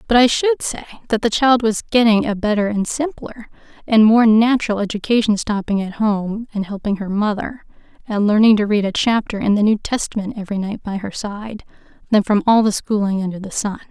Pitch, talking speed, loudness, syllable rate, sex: 215 Hz, 205 wpm, -17 LUFS, 5.5 syllables/s, female